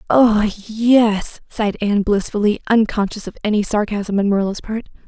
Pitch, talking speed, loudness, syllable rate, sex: 210 Hz, 140 wpm, -18 LUFS, 5.1 syllables/s, female